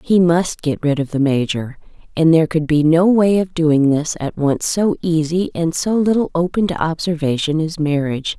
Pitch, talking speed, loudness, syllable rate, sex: 165 Hz, 200 wpm, -17 LUFS, 4.9 syllables/s, female